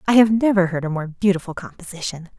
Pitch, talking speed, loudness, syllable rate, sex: 185 Hz, 200 wpm, -20 LUFS, 6.4 syllables/s, female